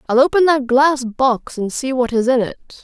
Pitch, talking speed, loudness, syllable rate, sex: 260 Hz, 235 wpm, -16 LUFS, 4.5 syllables/s, female